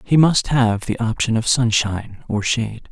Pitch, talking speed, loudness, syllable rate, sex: 115 Hz, 185 wpm, -19 LUFS, 4.8 syllables/s, male